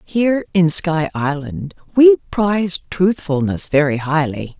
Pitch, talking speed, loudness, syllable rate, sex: 165 Hz, 120 wpm, -17 LUFS, 4.0 syllables/s, female